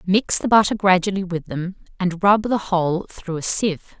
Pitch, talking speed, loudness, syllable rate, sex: 185 Hz, 195 wpm, -20 LUFS, 5.0 syllables/s, female